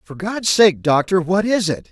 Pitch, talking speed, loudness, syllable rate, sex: 185 Hz, 220 wpm, -17 LUFS, 4.5 syllables/s, male